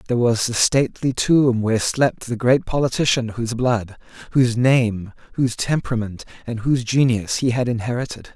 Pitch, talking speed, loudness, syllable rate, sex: 120 Hz, 160 wpm, -20 LUFS, 5.5 syllables/s, male